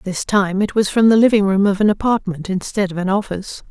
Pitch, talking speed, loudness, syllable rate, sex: 200 Hz, 245 wpm, -17 LUFS, 5.9 syllables/s, female